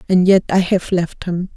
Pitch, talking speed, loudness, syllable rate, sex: 180 Hz, 230 wpm, -16 LUFS, 4.6 syllables/s, female